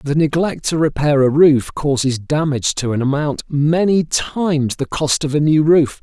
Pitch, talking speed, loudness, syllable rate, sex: 150 Hz, 190 wpm, -16 LUFS, 4.6 syllables/s, male